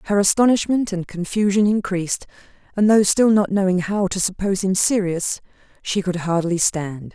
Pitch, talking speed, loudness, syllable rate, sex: 195 Hz, 160 wpm, -19 LUFS, 5.1 syllables/s, female